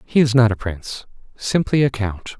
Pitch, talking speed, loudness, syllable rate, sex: 120 Hz, 200 wpm, -19 LUFS, 5.0 syllables/s, male